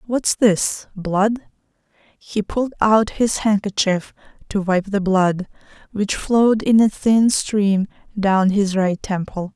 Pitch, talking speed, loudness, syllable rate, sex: 205 Hz, 140 wpm, -19 LUFS, 3.5 syllables/s, female